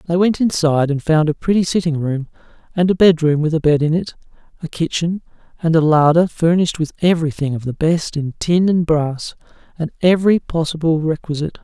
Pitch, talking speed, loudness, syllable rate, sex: 160 Hz, 185 wpm, -17 LUFS, 5.8 syllables/s, male